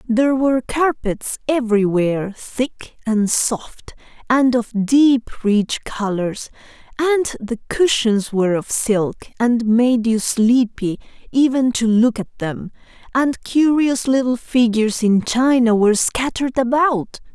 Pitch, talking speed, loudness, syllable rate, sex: 240 Hz, 125 wpm, -18 LUFS, 3.9 syllables/s, female